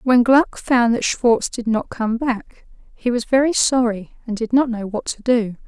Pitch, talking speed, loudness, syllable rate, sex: 235 Hz, 210 wpm, -19 LUFS, 4.3 syllables/s, female